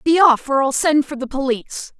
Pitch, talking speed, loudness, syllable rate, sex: 280 Hz, 240 wpm, -17 LUFS, 5.2 syllables/s, female